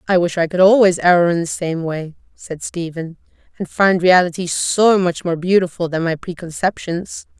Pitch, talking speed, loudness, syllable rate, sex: 175 Hz, 180 wpm, -17 LUFS, 4.8 syllables/s, female